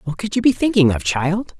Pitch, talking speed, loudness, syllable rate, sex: 185 Hz, 265 wpm, -18 LUFS, 5.5 syllables/s, female